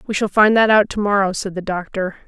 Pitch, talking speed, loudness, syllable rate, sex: 200 Hz, 265 wpm, -17 LUFS, 5.9 syllables/s, female